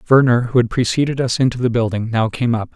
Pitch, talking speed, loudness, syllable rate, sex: 120 Hz, 240 wpm, -17 LUFS, 6.4 syllables/s, male